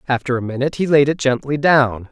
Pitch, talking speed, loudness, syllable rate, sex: 135 Hz, 225 wpm, -17 LUFS, 6.2 syllables/s, male